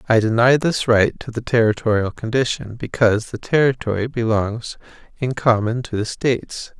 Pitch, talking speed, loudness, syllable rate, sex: 115 Hz, 150 wpm, -19 LUFS, 5.0 syllables/s, male